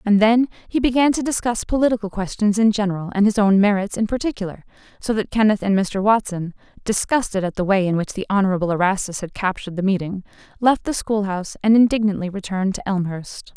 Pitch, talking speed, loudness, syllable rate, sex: 205 Hz, 195 wpm, -20 LUFS, 6.2 syllables/s, female